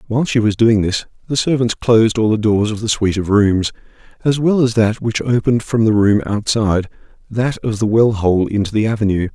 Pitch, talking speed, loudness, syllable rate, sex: 110 Hz, 210 wpm, -16 LUFS, 5.6 syllables/s, male